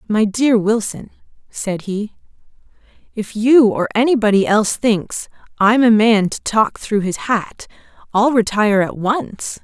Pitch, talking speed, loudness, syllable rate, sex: 215 Hz, 145 wpm, -16 LUFS, 4.1 syllables/s, female